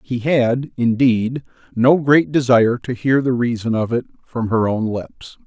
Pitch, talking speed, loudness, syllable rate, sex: 120 Hz, 175 wpm, -17 LUFS, 4.2 syllables/s, male